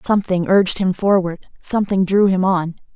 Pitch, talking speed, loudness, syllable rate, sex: 190 Hz, 165 wpm, -17 LUFS, 5.4 syllables/s, female